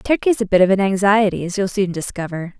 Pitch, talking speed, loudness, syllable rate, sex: 195 Hz, 230 wpm, -18 LUFS, 5.9 syllables/s, female